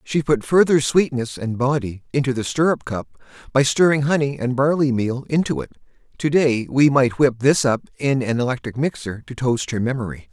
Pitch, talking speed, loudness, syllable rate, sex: 130 Hz, 185 wpm, -20 LUFS, 5.3 syllables/s, male